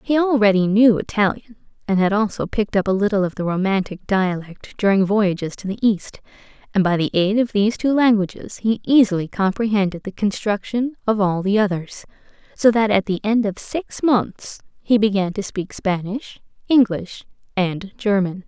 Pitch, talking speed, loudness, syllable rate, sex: 205 Hz, 170 wpm, -19 LUFS, 5.0 syllables/s, female